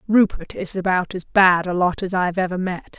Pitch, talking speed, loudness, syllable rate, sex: 190 Hz, 240 wpm, -20 LUFS, 5.3 syllables/s, female